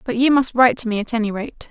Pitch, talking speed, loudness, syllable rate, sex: 235 Hz, 315 wpm, -18 LUFS, 6.8 syllables/s, female